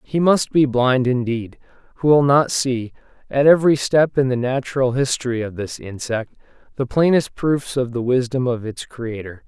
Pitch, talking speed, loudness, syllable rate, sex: 130 Hz, 175 wpm, -19 LUFS, 4.8 syllables/s, male